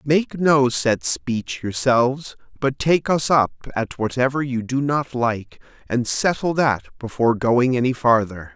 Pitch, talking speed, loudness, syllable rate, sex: 125 Hz, 155 wpm, -20 LUFS, 4.2 syllables/s, male